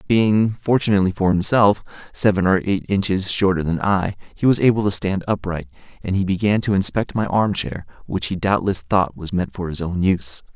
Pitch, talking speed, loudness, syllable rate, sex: 95 Hz, 200 wpm, -19 LUFS, 5.3 syllables/s, male